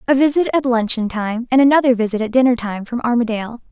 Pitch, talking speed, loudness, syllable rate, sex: 240 Hz, 210 wpm, -17 LUFS, 6.5 syllables/s, female